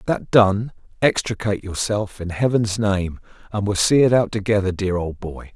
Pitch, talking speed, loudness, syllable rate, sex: 105 Hz, 175 wpm, -20 LUFS, 4.8 syllables/s, male